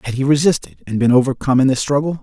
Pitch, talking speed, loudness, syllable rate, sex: 135 Hz, 240 wpm, -16 LUFS, 7.4 syllables/s, male